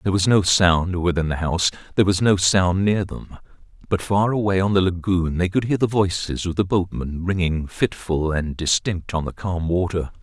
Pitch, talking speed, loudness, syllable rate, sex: 90 Hz, 205 wpm, -21 LUFS, 5.1 syllables/s, male